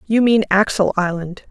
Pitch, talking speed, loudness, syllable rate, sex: 200 Hz, 160 wpm, -16 LUFS, 4.6 syllables/s, female